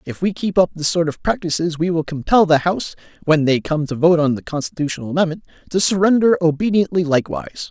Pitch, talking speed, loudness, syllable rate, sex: 170 Hz, 205 wpm, -18 LUFS, 6.3 syllables/s, male